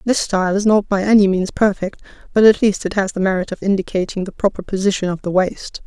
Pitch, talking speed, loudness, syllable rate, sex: 195 Hz, 235 wpm, -17 LUFS, 6.1 syllables/s, female